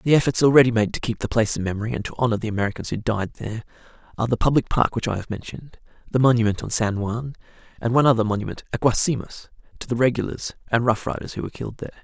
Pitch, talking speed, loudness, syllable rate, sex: 115 Hz, 235 wpm, -22 LUFS, 7.7 syllables/s, male